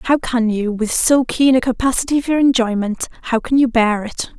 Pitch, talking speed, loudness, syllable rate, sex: 245 Hz, 190 wpm, -16 LUFS, 5.0 syllables/s, female